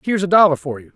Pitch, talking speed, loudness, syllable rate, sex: 165 Hz, 315 wpm, -15 LUFS, 8.2 syllables/s, male